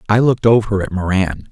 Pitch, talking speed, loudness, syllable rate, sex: 100 Hz, 200 wpm, -15 LUFS, 6.1 syllables/s, male